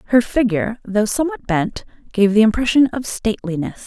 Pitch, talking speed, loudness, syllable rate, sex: 225 Hz, 155 wpm, -18 LUFS, 5.8 syllables/s, female